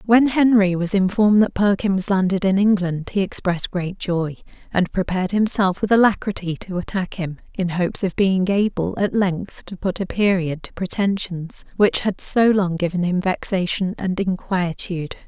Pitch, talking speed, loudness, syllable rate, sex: 190 Hz, 175 wpm, -20 LUFS, 4.9 syllables/s, female